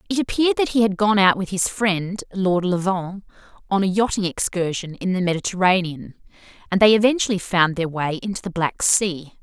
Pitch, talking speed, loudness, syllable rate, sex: 190 Hz, 185 wpm, -20 LUFS, 5.3 syllables/s, female